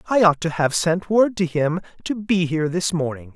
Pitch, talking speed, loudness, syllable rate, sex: 170 Hz, 235 wpm, -21 LUFS, 5.2 syllables/s, male